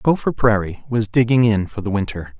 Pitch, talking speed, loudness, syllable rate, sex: 110 Hz, 200 wpm, -19 LUFS, 5.2 syllables/s, male